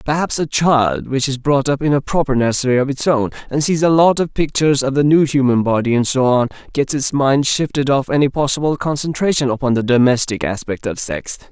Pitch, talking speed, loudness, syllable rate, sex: 135 Hz, 220 wpm, -16 LUFS, 5.6 syllables/s, male